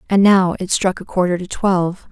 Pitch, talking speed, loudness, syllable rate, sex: 185 Hz, 225 wpm, -17 LUFS, 5.3 syllables/s, female